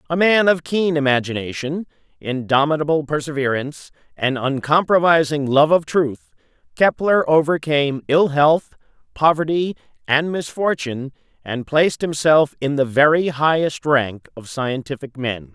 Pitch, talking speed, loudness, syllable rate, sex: 150 Hz, 115 wpm, -18 LUFS, 4.7 syllables/s, male